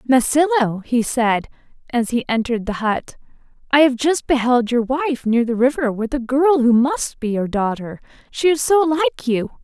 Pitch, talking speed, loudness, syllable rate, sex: 250 Hz, 185 wpm, -18 LUFS, 4.7 syllables/s, female